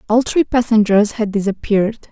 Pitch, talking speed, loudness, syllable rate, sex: 220 Hz, 140 wpm, -16 LUFS, 5.4 syllables/s, female